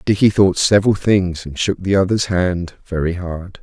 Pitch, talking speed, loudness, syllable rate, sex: 95 Hz, 180 wpm, -17 LUFS, 4.6 syllables/s, male